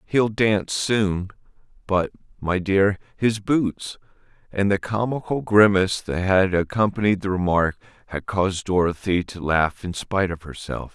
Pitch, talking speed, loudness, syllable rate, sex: 95 Hz, 145 wpm, -22 LUFS, 4.5 syllables/s, male